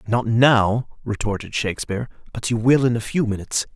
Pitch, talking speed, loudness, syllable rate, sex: 115 Hz, 175 wpm, -21 LUFS, 5.7 syllables/s, male